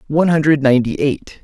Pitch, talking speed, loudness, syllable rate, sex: 145 Hz, 170 wpm, -15 LUFS, 6.4 syllables/s, male